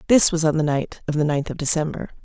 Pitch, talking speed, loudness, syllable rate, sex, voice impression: 155 Hz, 270 wpm, -21 LUFS, 6.5 syllables/s, female, very feminine, adult-like, slightly middle-aged, thin, slightly tensed, slightly powerful, bright, slightly hard, clear, fluent, slightly raspy, slightly cute, cool, intellectual, refreshing, slightly sincere, calm, friendly, slightly reassuring, unique, slightly elegant, strict